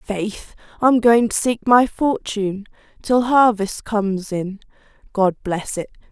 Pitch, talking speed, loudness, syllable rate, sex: 215 Hz, 135 wpm, -19 LUFS, 3.9 syllables/s, female